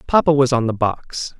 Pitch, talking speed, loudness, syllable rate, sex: 130 Hz, 215 wpm, -18 LUFS, 4.8 syllables/s, male